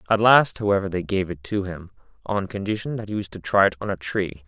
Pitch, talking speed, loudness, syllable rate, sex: 95 Hz, 255 wpm, -23 LUFS, 5.9 syllables/s, male